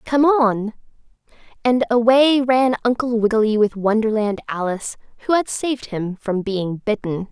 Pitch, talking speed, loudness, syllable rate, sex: 230 Hz, 140 wpm, -19 LUFS, 4.7 syllables/s, female